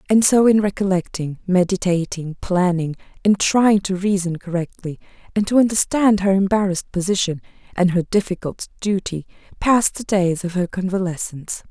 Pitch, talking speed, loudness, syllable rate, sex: 190 Hz, 140 wpm, -19 LUFS, 5.2 syllables/s, female